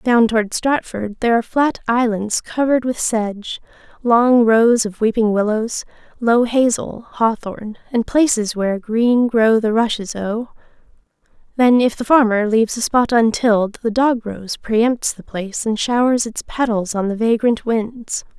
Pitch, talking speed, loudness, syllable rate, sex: 230 Hz, 155 wpm, -17 LUFS, 4.5 syllables/s, female